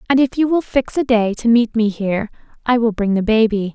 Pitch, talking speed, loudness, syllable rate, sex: 225 Hz, 255 wpm, -17 LUFS, 5.6 syllables/s, female